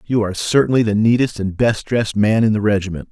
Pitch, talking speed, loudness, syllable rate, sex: 110 Hz, 230 wpm, -17 LUFS, 6.4 syllables/s, male